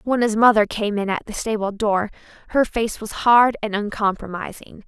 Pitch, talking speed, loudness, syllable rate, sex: 215 Hz, 185 wpm, -20 LUFS, 5.0 syllables/s, female